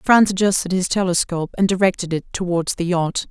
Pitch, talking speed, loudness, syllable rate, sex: 180 Hz, 180 wpm, -19 LUFS, 5.8 syllables/s, female